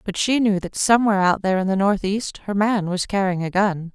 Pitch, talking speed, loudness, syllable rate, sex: 195 Hz, 245 wpm, -20 LUFS, 5.8 syllables/s, female